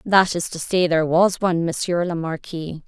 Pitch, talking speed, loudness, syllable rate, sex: 170 Hz, 210 wpm, -21 LUFS, 5.2 syllables/s, female